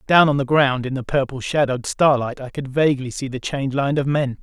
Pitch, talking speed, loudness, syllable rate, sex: 135 Hz, 245 wpm, -20 LUFS, 5.8 syllables/s, male